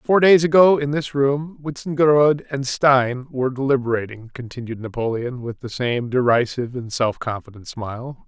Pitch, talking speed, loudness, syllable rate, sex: 130 Hz, 150 wpm, -20 LUFS, 5.1 syllables/s, male